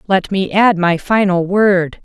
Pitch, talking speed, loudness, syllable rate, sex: 190 Hz, 175 wpm, -14 LUFS, 3.7 syllables/s, female